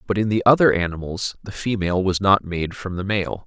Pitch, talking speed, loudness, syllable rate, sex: 95 Hz, 225 wpm, -21 LUFS, 5.6 syllables/s, male